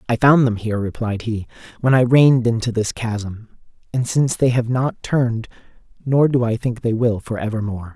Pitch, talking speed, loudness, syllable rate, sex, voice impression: 120 Hz, 195 wpm, -19 LUFS, 5.4 syllables/s, male, very masculine, very middle-aged, very thick, tensed, very powerful, slightly bright, slightly soft, clear, fluent, very cool, intellectual, very sincere, very calm, mature, friendly, reassuring, wild, slightly sweet, slightly lively, slightly strict, slightly intense